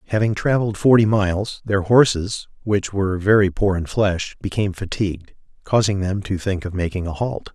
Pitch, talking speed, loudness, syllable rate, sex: 100 Hz, 175 wpm, -20 LUFS, 5.3 syllables/s, male